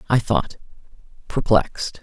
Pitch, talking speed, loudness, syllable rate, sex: 115 Hz, 90 wpm, -21 LUFS, 4.4 syllables/s, male